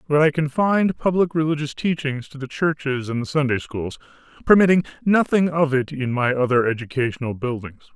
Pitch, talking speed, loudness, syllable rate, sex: 140 Hz, 165 wpm, -21 LUFS, 5.7 syllables/s, male